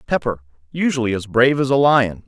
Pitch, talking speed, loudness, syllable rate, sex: 120 Hz, 185 wpm, -18 LUFS, 6.0 syllables/s, male